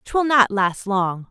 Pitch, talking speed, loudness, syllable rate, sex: 215 Hz, 185 wpm, -19 LUFS, 3.3 syllables/s, female